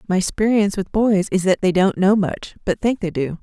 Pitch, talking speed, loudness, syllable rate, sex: 195 Hz, 245 wpm, -19 LUFS, 5.2 syllables/s, female